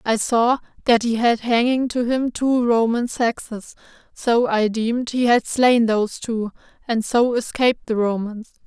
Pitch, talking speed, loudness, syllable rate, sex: 235 Hz, 165 wpm, -20 LUFS, 4.3 syllables/s, female